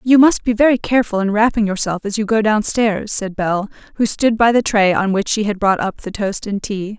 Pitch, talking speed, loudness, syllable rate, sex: 210 Hz, 250 wpm, -16 LUFS, 5.3 syllables/s, female